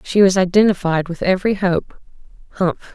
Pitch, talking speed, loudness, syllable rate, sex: 185 Hz, 140 wpm, -17 LUFS, 5.3 syllables/s, female